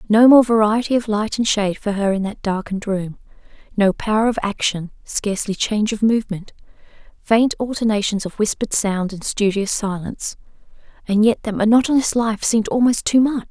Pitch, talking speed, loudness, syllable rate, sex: 215 Hz, 170 wpm, -18 LUFS, 5.6 syllables/s, female